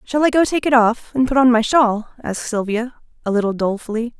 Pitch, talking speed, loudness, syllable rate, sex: 235 Hz, 230 wpm, -18 LUFS, 6.0 syllables/s, female